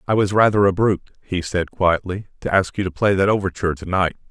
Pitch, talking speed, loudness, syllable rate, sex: 95 Hz, 235 wpm, -20 LUFS, 6.3 syllables/s, male